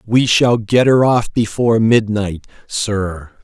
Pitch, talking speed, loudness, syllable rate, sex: 110 Hz, 140 wpm, -15 LUFS, 3.6 syllables/s, male